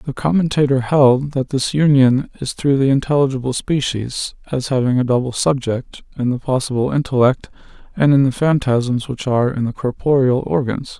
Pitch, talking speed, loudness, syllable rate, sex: 130 Hz, 165 wpm, -17 LUFS, 5.0 syllables/s, male